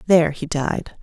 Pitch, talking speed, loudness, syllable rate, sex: 160 Hz, 175 wpm, -21 LUFS, 4.8 syllables/s, female